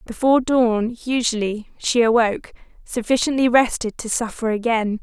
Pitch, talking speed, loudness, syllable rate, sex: 230 Hz, 120 wpm, -20 LUFS, 5.0 syllables/s, female